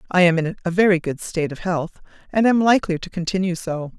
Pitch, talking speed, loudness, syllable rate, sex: 175 Hz, 225 wpm, -20 LUFS, 6.2 syllables/s, female